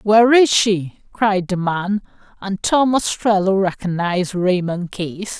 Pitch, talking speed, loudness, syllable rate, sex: 195 Hz, 135 wpm, -18 LUFS, 3.9 syllables/s, female